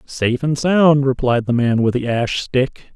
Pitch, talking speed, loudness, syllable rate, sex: 130 Hz, 205 wpm, -17 LUFS, 4.4 syllables/s, male